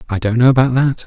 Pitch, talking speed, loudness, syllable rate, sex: 125 Hz, 280 wpm, -14 LUFS, 6.7 syllables/s, male